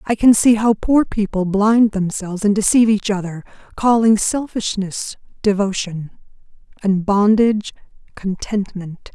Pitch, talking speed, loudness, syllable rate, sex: 205 Hz, 120 wpm, -17 LUFS, 4.5 syllables/s, female